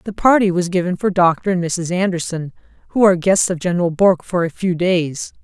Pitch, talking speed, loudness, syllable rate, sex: 180 Hz, 210 wpm, -17 LUFS, 5.8 syllables/s, female